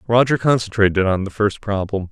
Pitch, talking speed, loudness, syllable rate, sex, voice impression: 105 Hz, 170 wpm, -18 LUFS, 5.6 syllables/s, male, very masculine, adult-like, middle-aged, very thick, tensed, powerful, slightly bright, slightly soft, slightly muffled, fluent, very cool, intellectual, very sincere, very calm, friendly, reassuring, very unique, very wild, sweet, lively, very kind, slightly modest